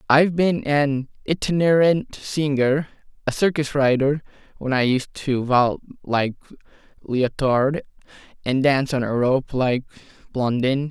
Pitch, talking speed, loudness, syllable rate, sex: 135 Hz, 120 wpm, -21 LUFS, 4.1 syllables/s, male